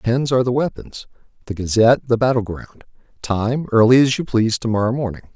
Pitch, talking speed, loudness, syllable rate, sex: 115 Hz, 180 wpm, -18 LUFS, 5.9 syllables/s, male